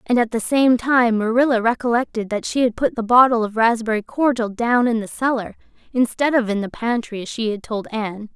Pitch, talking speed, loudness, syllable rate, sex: 230 Hz, 215 wpm, -19 LUFS, 5.5 syllables/s, female